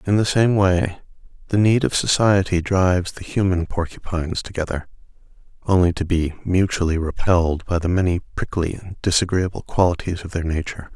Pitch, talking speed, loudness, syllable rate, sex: 90 Hz, 155 wpm, -20 LUFS, 5.4 syllables/s, male